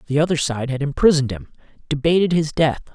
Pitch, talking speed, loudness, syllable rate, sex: 145 Hz, 185 wpm, -19 LUFS, 6.6 syllables/s, male